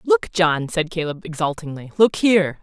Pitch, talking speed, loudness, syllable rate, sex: 160 Hz, 160 wpm, -20 LUFS, 4.9 syllables/s, female